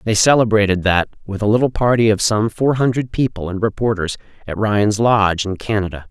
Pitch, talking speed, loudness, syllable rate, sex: 105 Hz, 185 wpm, -17 LUFS, 5.6 syllables/s, male